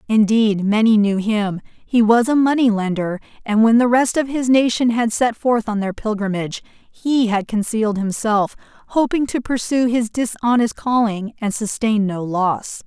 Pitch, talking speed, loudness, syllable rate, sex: 225 Hz, 170 wpm, -18 LUFS, 4.5 syllables/s, female